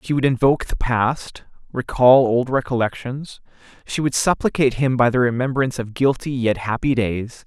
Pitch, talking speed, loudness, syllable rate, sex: 125 Hz, 160 wpm, -19 LUFS, 5.1 syllables/s, male